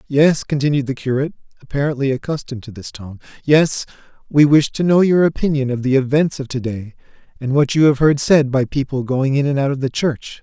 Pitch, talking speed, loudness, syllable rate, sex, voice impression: 140 Hz, 215 wpm, -17 LUFS, 5.8 syllables/s, male, masculine, adult-like, slightly thick, bright, clear, slightly halting, sincere, friendly, slightly wild, slightly lively, kind, slightly modest